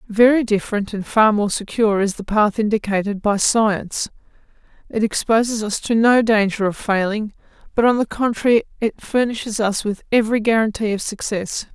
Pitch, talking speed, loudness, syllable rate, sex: 215 Hz, 165 wpm, -19 LUFS, 5.3 syllables/s, female